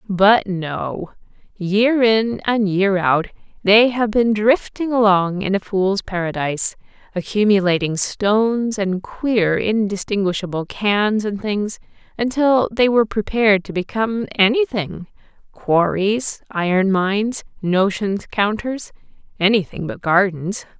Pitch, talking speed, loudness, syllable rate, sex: 205 Hz, 110 wpm, -18 LUFS, 3.9 syllables/s, female